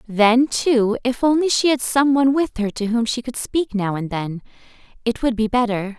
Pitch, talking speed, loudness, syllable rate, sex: 240 Hz, 220 wpm, -19 LUFS, 4.8 syllables/s, female